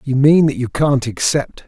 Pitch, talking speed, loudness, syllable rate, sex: 135 Hz, 215 wpm, -15 LUFS, 5.0 syllables/s, male